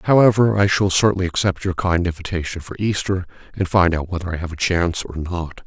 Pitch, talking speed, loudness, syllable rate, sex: 90 Hz, 210 wpm, -20 LUFS, 5.9 syllables/s, male